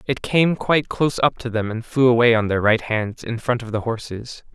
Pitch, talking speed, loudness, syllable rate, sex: 120 Hz, 250 wpm, -20 LUFS, 5.3 syllables/s, male